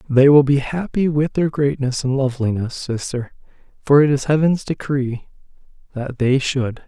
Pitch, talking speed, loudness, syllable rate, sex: 135 Hz, 155 wpm, -18 LUFS, 4.7 syllables/s, male